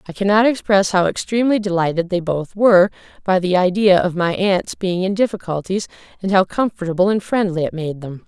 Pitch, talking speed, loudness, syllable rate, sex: 190 Hz, 190 wpm, -18 LUFS, 5.6 syllables/s, female